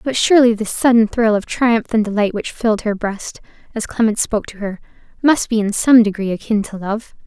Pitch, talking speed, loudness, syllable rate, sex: 220 Hz, 215 wpm, -17 LUFS, 5.5 syllables/s, female